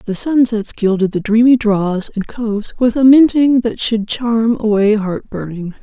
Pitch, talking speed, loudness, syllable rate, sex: 220 Hz, 175 wpm, -14 LUFS, 4.4 syllables/s, female